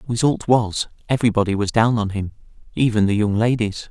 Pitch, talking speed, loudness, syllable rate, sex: 110 Hz, 155 wpm, -19 LUFS, 5.8 syllables/s, male